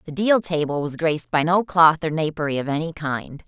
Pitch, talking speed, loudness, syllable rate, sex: 160 Hz, 225 wpm, -21 LUFS, 5.4 syllables/s, female